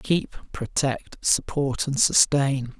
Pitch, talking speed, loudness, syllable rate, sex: 140 Hz, 110 wpm, -23 LUFS, 3.2 syllables/s, male